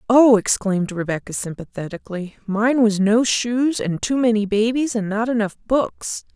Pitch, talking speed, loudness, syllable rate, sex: 220 Hz, 140 wpm, -20 LUFS, 4.8 syllables/s, female